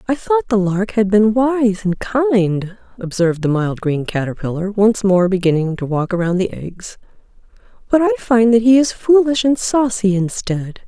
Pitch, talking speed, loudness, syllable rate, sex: 210 Hz, 175 wpm, -16 LUFS, 4.6 syllables/s, female